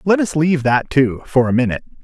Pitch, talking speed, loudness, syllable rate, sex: 145 Hz, 235 wpm, -16 LUFS, 6.4 syllables/s, male